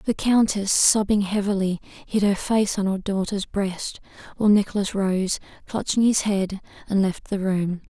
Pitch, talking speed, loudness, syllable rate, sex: 200 Hz, 160 wpm, -22 LUFS, 4.4 syllables/s, female